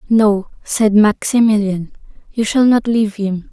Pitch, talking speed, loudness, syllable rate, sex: 215 Hz, 135 wpm, -15 LUFS, 4.2 syllables/s, female